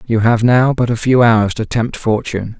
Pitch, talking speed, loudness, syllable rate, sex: 115 Hz, 230 wpm, -14 LUFS, 4.8 syllables/s, male